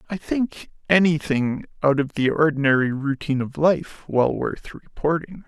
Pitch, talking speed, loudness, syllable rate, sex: 150 Hz, 145 wpm, -22 LUFS, 4.5 syllables/s, male